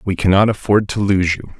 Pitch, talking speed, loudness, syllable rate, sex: 95 Hz, 225 wpm, -16 LUFS, 5.4 syllables/s, male